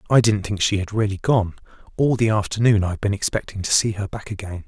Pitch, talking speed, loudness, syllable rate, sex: 105 Hz, 230 wpm, -21 LUFS, 6.2 syllables/s, male